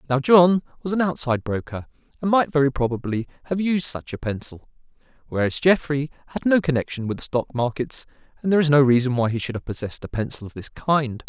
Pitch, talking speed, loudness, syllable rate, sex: 140 Hz, 205 wpm, -22 LUFS, 6.2 syllables/s, male